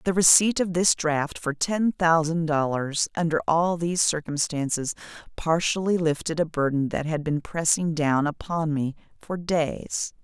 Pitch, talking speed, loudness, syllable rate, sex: 160 Hz, 150 wpm, -24 LUFS, 4.3 syllables/s, female